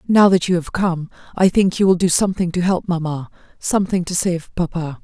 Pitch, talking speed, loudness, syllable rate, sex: 175 Hz, 215 wpm, -18 LUFS, 5.6 syllables/s, female